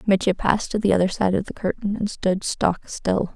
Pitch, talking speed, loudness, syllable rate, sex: 195 Hz, 230 wpm, -22 LUFS, 5.3 syllables/s, female